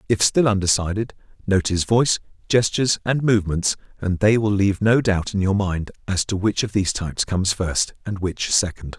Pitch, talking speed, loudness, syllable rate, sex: 100 Hz, 195 wpm, -21 LUFS, 5.5 syllables/s, male